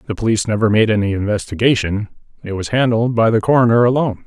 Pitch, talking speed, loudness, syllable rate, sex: 110 Hz, 185 wpm, -16 LUFS, 6.9 syllables/s, male